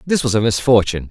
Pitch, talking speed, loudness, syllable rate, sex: 110 Hz, 220 wpm, -16 LUFS, 7.1 syllables/s, male